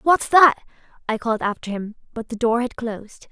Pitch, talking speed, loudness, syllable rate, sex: 235 Hz, 200 wpm, -20 LUFS, 5.5 syllables/s, female